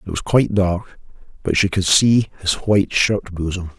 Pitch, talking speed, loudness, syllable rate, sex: 95 Hz, 190 wpm, -18 LUFS, 4.9 syllables/s, male